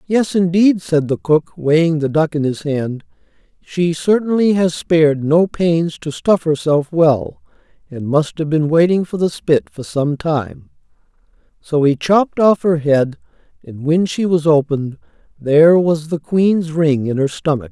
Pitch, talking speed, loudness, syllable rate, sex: 160 Hz, 175 wpm, -16 LUFS, 4.3 syllables/s, male